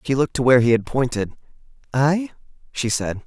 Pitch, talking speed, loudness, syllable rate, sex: 130 Hz, 165 wpm, -20 LUFS, 5.4 syllables/s, male